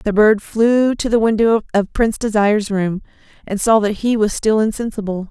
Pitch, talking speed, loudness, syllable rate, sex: 215 Hz, 190 wpm, -16 LUFS, 5.2 syllables/s, female